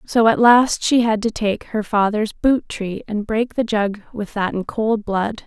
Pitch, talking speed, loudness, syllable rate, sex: 215 Hz, 220 wpm, -19 LUFS, 4.0 syllables/s, female